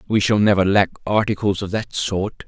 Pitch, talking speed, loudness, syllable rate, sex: 100 Hz, 195 wpm, -19 LUFS, 5.2 syllables/s, male